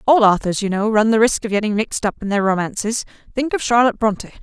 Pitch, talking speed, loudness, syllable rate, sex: 215 Hz, 230 wpm, -18 LUFS, 6.7 syllables/s, female